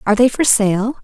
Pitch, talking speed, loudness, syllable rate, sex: 230 Hz, 235 wpm, -14 LUFS, 5.6 syllables/s, female